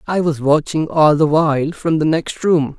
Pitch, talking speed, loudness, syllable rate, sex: 155 Hz, 215 wpm, -16 LUFS, 4.5 syllables/s, male